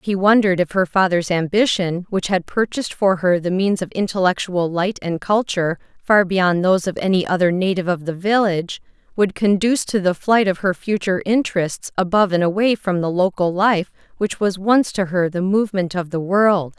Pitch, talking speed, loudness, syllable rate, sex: 190 Hz, 195 wpm, -18 LUFS, 5.4 syllables/s, female